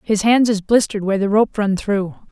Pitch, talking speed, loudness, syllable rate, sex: 210 Hz, 235 wpm, -17 LUFS, 5.8 syllables/s, female